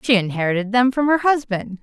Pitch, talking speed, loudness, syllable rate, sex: 230 Hz, 195 wpm, -18 LUFS, 5.8 syllables/s, female